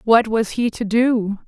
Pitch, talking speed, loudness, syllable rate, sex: 225 Hz, 205 wpm, -18 LUFS, 3.8 syllables/s, female